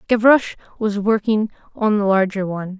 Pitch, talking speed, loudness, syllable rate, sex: 210 Hz, 150 wpm, -18 LUFS, 5.5 syllables/s, female